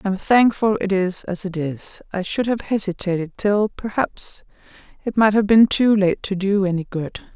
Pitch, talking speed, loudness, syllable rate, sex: 200 Hz, 190 wpm, -20 LUFS, 4.6 syllables/s, female